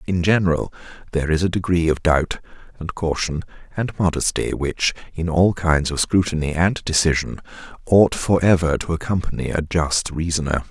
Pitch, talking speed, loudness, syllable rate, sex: 85 Hz, 155 wpm, -20 LUFS, 5.1 syllables/s, male